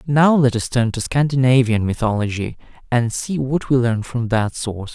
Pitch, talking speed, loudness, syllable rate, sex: 125 Hz, 180 wpm, -19 LUFS, 4.9 syllables/s, male